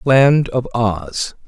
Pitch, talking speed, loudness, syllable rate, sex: 120 Hz, 120 wpm, -17 LUFS, 2.4 syllables/s, male